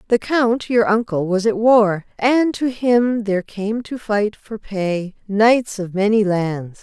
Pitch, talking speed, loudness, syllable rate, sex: 215 Hz, 175 wpm, -18 LUFS, 3.6 syllables/s, female